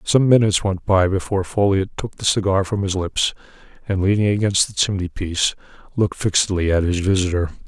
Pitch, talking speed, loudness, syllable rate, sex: 95 Hz, 170 wpm, -19 LUFS, 5.8 syllables/s, male